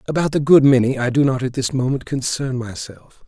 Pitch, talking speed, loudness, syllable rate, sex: 135 Hz, 220 wpm, -18 LUFS, 5.5 syllables/s, male